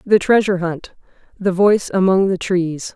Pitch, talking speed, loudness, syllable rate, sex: 185 Hz, 140 wpm, -17 LUFS, 5.0 syllables/s, female